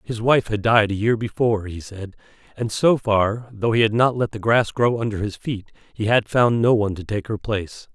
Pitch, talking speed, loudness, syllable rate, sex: 110 Hz, 240 wpm, -20 LUFS, 5.2 syllables/s, male